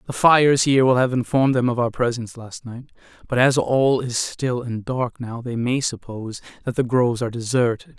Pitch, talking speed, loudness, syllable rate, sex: 125 Hz, 210 wpm, -20 LUFS, 5.6 syllables/s, male